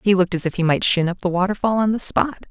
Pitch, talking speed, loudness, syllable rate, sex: 190 Hz, 310 wpm, -19 LUFS, 6.6 syllables/s, female